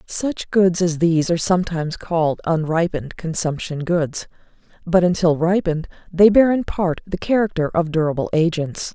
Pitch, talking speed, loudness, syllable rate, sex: 170 Hz, 150 wpm, -19 LUFS, 5.2 syllables/s, female